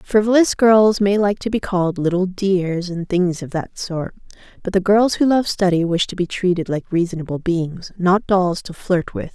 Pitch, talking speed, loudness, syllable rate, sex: 185 Hz, 205 wpm, -18 LUFS, 4.8 syllables/s, female